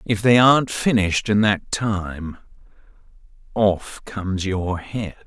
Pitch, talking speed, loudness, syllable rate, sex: 100 Hz, 125 wpm, -20 LUFS, 3.8 syllables/s, male